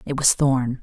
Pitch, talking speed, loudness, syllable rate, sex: 130 Hz, 220 wpm, -19 LUFS, 4.2 syllables/s, female